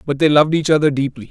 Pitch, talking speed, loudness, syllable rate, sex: 145 Hz, 275 wpm, -15 LUFS, 7.6 syllables/s, male